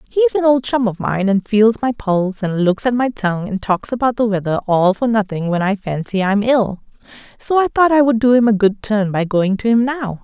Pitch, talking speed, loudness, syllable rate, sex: 220 Hz, 260 wpm, -16 LUFS, 5.6 syllables/s, female